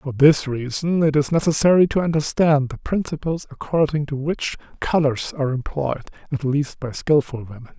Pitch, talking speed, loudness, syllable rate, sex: 145 Hz, 160 wpm, -20 LUFS, 5.1 syllables/s, male